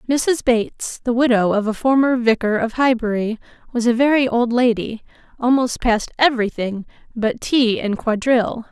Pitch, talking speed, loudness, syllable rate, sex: 235 Hz, 160 wpm, -18 LUFS, 4.9 syllables/s, female